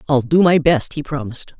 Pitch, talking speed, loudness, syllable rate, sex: 140 Hz, 225 wpm, -16 LUFS, 5.8 syllables/s, female